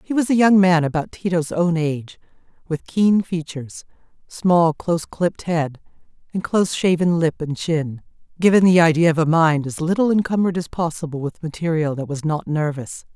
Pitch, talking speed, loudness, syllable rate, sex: 165 Hz, 180 wpm, -19 LUFS, 5.3 syllables/s, female